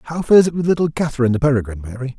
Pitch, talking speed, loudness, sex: 140 Hz, 245 wpm, -17 LUFS, male